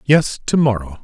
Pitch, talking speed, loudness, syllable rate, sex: 120 Hz, 175 wpm, -17 LUFS, 4.8 syllables/s, male